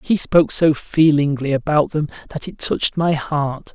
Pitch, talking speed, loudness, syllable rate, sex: 150 Hz, 175 wpm, -18 LUFS, 4.6 syllables/s, male